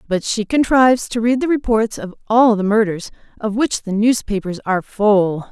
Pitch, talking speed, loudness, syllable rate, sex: 220 Hz, 185 wpm, -17 LUFS, 4.8 syllables/s, female